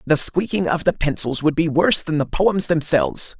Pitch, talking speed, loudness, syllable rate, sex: 160 Hz, 210 wpm, -19 LUFS, 5.2 syllables/s, male